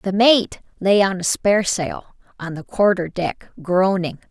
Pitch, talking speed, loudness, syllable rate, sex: 190 Hz, 155 wpm, -19 LUFS, 4.4 syllables/s, female